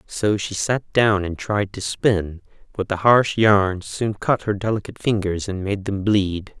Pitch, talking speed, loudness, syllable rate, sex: 100 Hz, 190 wpm, -21 LUFS, 4.1 syllables/s, male